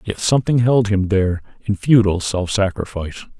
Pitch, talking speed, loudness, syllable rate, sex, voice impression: 100 Hz, 160 wpm, -18 LUFS, 5.9 syllables/s, male, masculine, middle-aged, thick, tensed, slightly hard, slightly muffled, cool, intellectual, mature, wild, slightly strict